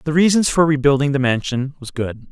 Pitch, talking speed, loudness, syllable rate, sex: 140 Hz, 205 wpm, -17 LUFS, 5.6 syllables/s, male